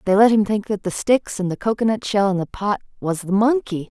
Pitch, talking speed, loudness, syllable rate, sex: 205 Hz, 255 wpm, -20 LUFS, 5.6 syllables/s, female